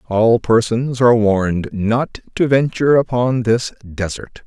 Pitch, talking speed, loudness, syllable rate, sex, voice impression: 115 Hz, 135 wpm, -16 LUFS, 4.3 syllables/s, male, masculine, adult-like, slightly refreshing, sincere, friendly, slightly kind